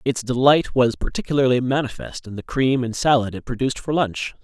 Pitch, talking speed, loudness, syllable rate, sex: 125 Hz, 190 wpm, -20 LUFS, 5.6 syllables/s, male